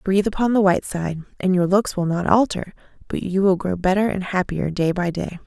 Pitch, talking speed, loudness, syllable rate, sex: 185 Hz, 230 wpm, -21 LUFS, 5.6 syllables/s, female